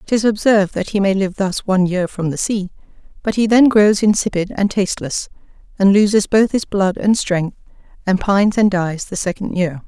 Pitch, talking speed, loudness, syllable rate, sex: 195 Hz, 200 wpm, -16 LUFS, 5.3 syllables/s, female